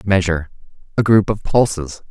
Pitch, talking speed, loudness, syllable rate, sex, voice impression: 95 Hz, 145 wpm, -17 LUFS, 5.3 syllables/s, male, very masculine, very adult-like, middle-aged, very thick, tensed, powerful, slightly bright, slightly soft, very clear, very fluent, slightly raspy, very cool, very intellectual, sincere, calm, mature, friendly, very reassuring, very unique, elegant, wild, slightly sweet, lively, very kind, modest